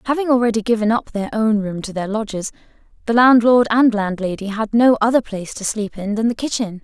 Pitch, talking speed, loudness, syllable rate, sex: 220 Hz, 210 wpm, -18 LUFS, 5.8 syllables/s, female